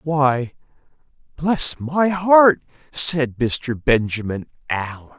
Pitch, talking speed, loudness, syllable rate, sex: 140 Hz, 95 wpm, -19 LUFS, 2.9 syllables/s, male